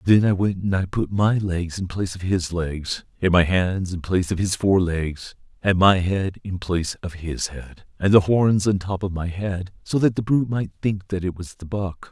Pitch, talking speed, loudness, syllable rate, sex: 95 Hz, 240 wpm, -22 LUFS, 4.8 syllables/s, male